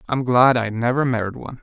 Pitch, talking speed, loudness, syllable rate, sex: 120 Hz, 220 wpm, -19 LUFS, 6.2 syllables/s, male